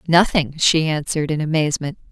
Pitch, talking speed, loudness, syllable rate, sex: 155 Hz, 140 wpm, -19 LUFS, 6.0 syllables/s, female